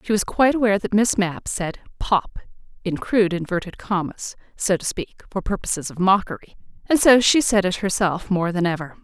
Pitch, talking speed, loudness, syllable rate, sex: 195 Hz, 195 wpm, -21 LUFS, 5.4 syllables/s, female